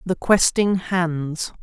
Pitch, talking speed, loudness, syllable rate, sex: 175 Hz, 110 wpm, -20 LUFS, 2.8 syllables/s, female